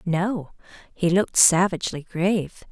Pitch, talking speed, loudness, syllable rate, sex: 180 Hz, 110 wpm, -21 LUFS, 4.4 syllables/s, female